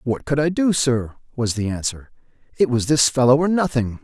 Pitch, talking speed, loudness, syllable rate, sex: 130 Hz, 210 wpm, -19 LUFS, 5.2 syllables/s, male